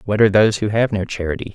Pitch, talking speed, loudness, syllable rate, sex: 105 Hz, 270 wpm, -17 LUFS, 7.7 syllables/s, male